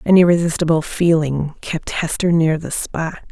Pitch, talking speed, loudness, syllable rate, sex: 160 Hz, 145 wpm, -18 LUFS, 4.5 syllables/s, female